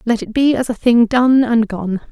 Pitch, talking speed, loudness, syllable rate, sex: 235 Hz, 255 wpm, -15 LUFS, 4.7 syllables/s, female